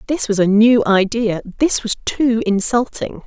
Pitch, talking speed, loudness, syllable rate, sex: 225 Hz, 145 wpm, -16 LUFS, 4.4 syllables/s, female